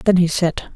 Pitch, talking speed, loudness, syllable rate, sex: 175 Hz, 240 wpm, -18 LUFS, 5.1 syllables/s, female